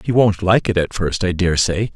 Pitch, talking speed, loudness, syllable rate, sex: 95 Hz, 245 wpm, -17 LUFS, 5.4 syllables/s, male